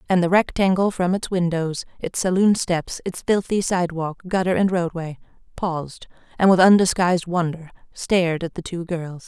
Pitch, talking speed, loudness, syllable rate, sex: 180 Hz, 160 wpm, -21 LUFS, 5.1 syllables/s, female